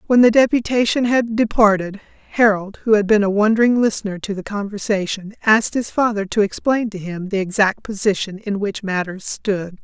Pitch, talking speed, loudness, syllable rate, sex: 210 Hz, 175 wpm, -18 LUFS, 5.4 syllables/s, female